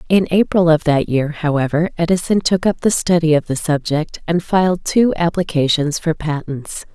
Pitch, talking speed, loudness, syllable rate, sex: 165 Hz, 175 wpm, -17 LUFS, 4.9 syllables/s, female